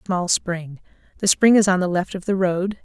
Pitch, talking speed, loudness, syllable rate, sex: 185 Hz, 210 wpm, -20 LUFS, 4.8 syllables/s, female